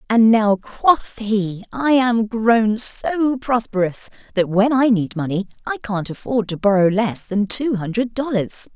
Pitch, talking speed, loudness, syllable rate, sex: 220 Hz, 165 wpm, -19 LUFS, 4.0 syllables/s, female